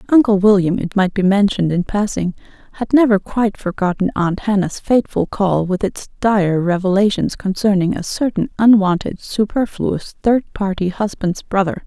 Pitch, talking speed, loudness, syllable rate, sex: 200 Hz, 140 wpm, -17 LUFS, 4.9 syllables/s, female